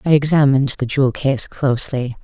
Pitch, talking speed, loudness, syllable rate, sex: 135 Hz, 160 wpm, -17 LUFS, 5.9 syllables/s, female